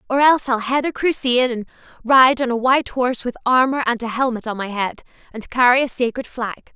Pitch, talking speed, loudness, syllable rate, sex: 250 Hz, 220 wpm, -18 LUFS, 5.9 syllables/s, female